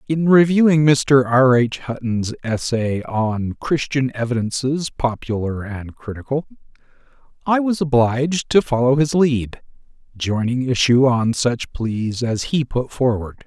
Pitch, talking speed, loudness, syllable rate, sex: 130 Hz, 130 wpm, -19 LUFS, 4.0 syllables/s, male